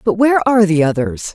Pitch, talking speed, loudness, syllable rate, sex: 195 Hz, 220 wpm, -14 LUFS, 6.4 syllables/s, female